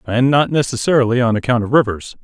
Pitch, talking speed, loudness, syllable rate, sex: 125 Hz, 190 wpm, -16 LUFS, 6.3 syllables/s, male